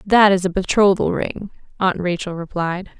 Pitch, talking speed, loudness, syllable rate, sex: 185 Hz, 160 wpm, -19 LUFS, 4.8 syllables/s, female